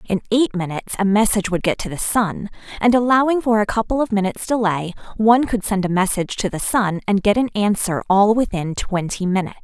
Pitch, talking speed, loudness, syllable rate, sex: 205 Hz, 210 wpm, -19 LUFS, 6.0 syllables/s, female